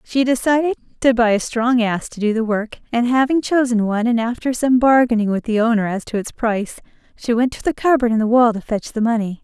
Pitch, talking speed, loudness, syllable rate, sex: 235 Hz, 240 wpm, -18 LUFS, 5.9 syllables/s, female